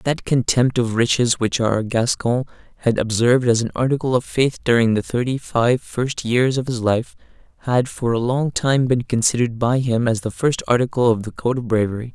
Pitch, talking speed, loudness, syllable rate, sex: 120 Hz, 205 wpm, -19 LUFS, 5.1 syllables/s, male